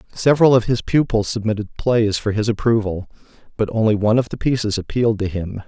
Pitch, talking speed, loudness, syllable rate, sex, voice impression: 110 Hz, 190 wpm, -19 LUFS, 6.2 syllables/s, male, masculine, adult-like, slightly dark, fluent, cool, calm, reassuring, slightly wild, kind, modest